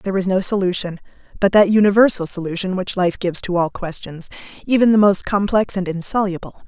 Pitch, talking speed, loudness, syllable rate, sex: 190 Hz, 180 wpm, -17 LUFS, 6.0 syllables/s, female